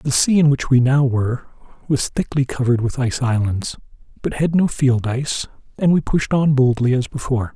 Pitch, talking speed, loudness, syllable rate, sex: 130 Hz, 200 wpm, -18 LUFS, 5.5 syllables/s, male